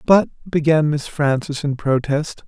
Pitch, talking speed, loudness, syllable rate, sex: 145 Hz, 145 wpm, -19 LUFS, 4.2 syllables/s, male